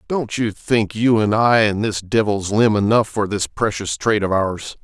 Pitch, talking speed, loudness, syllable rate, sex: 105 Hz, 210 wpm, -18 LUFS, 4.5 syllables/s, male